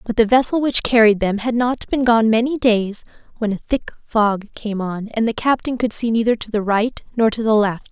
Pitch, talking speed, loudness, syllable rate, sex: 225 Hz, 235 wpm, -18 LUFS, 5.0 syllables/s, female